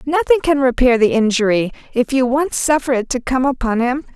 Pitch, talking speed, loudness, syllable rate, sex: 260 Hz, 200 wpm, -16 LUFS, 5.4 syllables/s, female